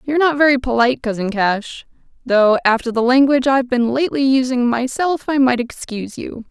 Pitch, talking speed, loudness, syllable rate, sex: 255 Hz, 175 wpm, -16 LUFS, 5.8 syllables/s, female